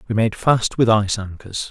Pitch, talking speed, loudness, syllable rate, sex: 110 Hz, 210 wpm, -19 LUFS, 5.2 syllables/s, male